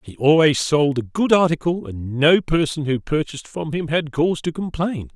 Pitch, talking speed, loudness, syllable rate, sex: 155 Hz, 200 wpm, -20 LUFS, 5.0 syllables/s, male